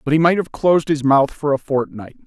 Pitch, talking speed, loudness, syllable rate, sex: 145 Hz, 265 wpm, -17 LUFS, 5.8 syllables/s, male